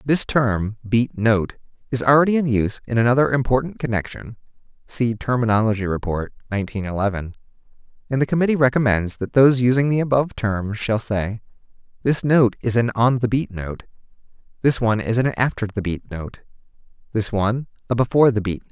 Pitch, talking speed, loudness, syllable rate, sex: 115 Hz, 165 wpm, -20 LUFS, 5.0 syllables/s, male